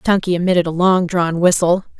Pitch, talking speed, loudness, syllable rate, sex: 175 Hz, 180 wpm, -16 LUFS, 5.7 syllables/s, female